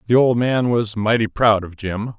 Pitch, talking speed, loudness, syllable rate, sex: 110 Hz, 220 wpm, -18 LUFS, 4.5 syllables/s, male